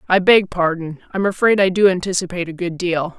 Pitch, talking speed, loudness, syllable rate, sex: 180 Hz, 205 wpm, -17 LUFS, 5.8 syllables/s, female